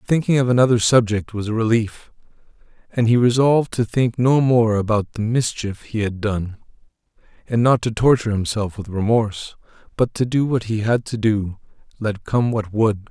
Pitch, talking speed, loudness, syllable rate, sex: 115 Hz, 180 wpm, -19 LUFS, 5.1 syllables/s, male